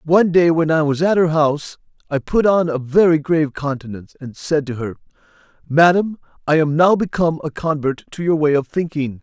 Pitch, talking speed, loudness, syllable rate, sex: 155 Hz, 200 wpm, -17 LUFS, 5.6 syllables/s, male